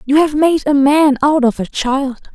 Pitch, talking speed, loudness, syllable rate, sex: 285 Hz, 230 wpm, -14 LUFS, 4.5 syllables/s, female